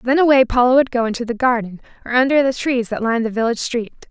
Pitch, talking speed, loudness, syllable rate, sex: 245 Hz, 250 wpm, -17 LUFS, 6.9 syllables/s, female